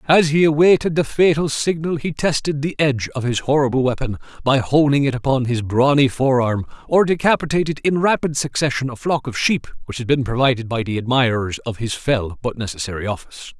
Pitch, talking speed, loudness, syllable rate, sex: 135 Hz, 190 wpm, -19 LUFS, 5.7 syllables/s, male